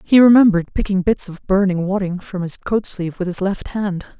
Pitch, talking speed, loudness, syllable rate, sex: 190 Hz, 215 wpm, -18 LUFS, 5.7 syllables/s, female